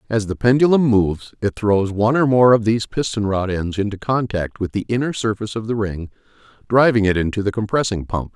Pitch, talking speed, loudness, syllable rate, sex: 110 Hz, 210 wpm, -19 LUFS, 5.9 syllables/s, male